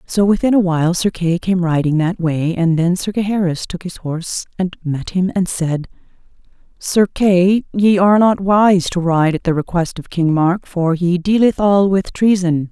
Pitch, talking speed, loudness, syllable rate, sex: 180 Hz, 200 wpm, -16 LUFS, 4.5 syllables/s, female